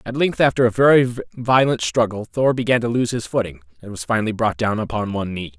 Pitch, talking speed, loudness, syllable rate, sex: 115 Hz, 225 wpm, -19 LUFS, 5.9 syllables/s, male